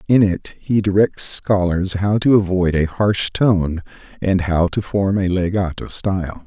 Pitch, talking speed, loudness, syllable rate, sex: 95 Hz, 165 wpm, -18 LUFS, 4.1 syllables/s, male